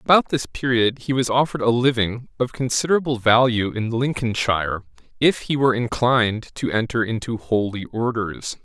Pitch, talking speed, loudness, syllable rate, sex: 120 Hz, 155 wpm, -21 LUFS, 5.2 syllables/s, male